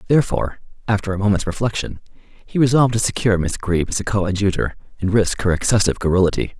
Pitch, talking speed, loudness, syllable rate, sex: 100 Hz, 175 wpm, -19 LUFS, 6.8 syllables/s, male